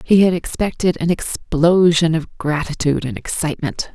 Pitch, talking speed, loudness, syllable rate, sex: 165 Hz, 135 wpm, -18 LUFS, 4.9 syllables/s, female